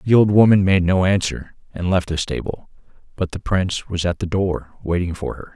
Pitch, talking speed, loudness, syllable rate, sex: 90 Hz, 215 wpm, -19 LUFS, 5.3 syllables/s, male